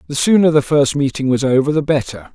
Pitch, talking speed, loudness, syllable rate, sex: 140 Hz, 230 wpm, -15 LUFS, 6.0 syllables/s, male